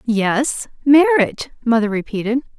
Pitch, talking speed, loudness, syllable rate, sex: 245 Hz, 95 wpm, -17 LUFS, 4.8 syllables/s, female